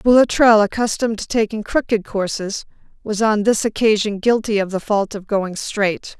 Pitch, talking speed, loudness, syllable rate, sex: 210 Hz, 165 wpm, -18 LUFS, 5.0 syllables/s, female